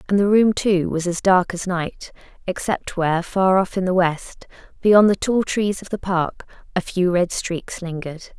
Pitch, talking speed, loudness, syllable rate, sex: 185 Hz, 200 wpm, -20 LUFS, 4.4 syllables/s, female